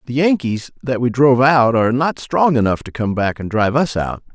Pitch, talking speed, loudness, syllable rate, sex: 125 Hz, 235 wpm, -16 LUFS, 5.5 syllables/s, male